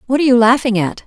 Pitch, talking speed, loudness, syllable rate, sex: 240 Hz, 280 wpm, -13 LUFS, 7.7 syllables/s, female